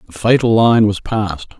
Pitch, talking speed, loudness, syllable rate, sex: 110 Hz, 190 wpm, -14 LUFS, 4.9 syllables/s, male